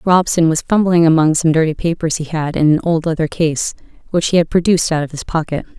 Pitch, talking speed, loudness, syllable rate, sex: 165 Hz, 230 wpm, -15 LUFS, 6.0 syllables/s, female